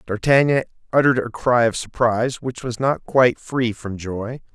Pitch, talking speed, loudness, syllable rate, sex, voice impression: 120 Hz, 170 wpm, -20 LUFS, 5.0 syllables/s, male, very masculine, very adult-like, middle-aged, thick, slightly tensed, slightly weak, slightly dark, slightly hard, slightly clear, slightly halting, slightly cool, slightly intellectual, sincere, calm, slightly mature, friendly, reassuring, slightly unique, slightly wild, slightly lively, kind, modest